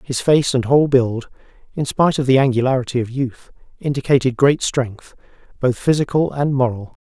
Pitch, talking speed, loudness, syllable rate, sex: 130 Hz, 160 wpm, -18 LUFS, 5.4 syllables/s, male